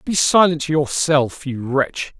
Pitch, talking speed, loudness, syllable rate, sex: 150 Hz, 135 wpm, -18 LUFS, 3.3 syllables/s, male